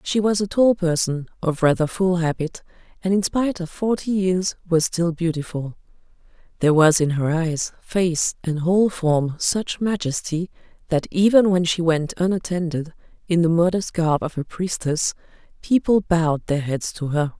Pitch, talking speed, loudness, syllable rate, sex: 170 Hz, 165 wpm, -21 LUFS, 4.6 syllables/s, female